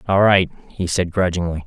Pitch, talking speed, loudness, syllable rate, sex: 90 Hz, 180 wpm, -19 LUFS, 5.2 syllables/s, male